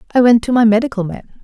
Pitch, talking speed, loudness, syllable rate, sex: 230 Hz, 250 wpm, -13 LUFS, 6.5 syllables/s, female